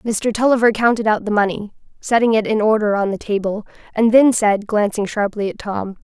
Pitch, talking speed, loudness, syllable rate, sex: 215 Hz, 195 wpm, -17 LUFS, 5.4 syllables/s, female